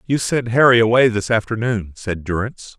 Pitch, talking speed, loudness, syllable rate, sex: 110 Hz, 175 wpm, -17 LUFS, 5.3 syllables/s, male